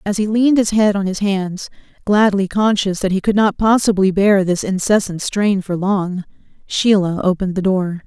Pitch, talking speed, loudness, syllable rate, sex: 195 Hz, 185 wpm, -16 LUFS, 4.9 syllables/s, female